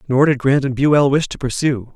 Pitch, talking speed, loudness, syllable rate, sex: 135 Hz, 245 wpm, -16 LUFS, 5.1 syllables/s, male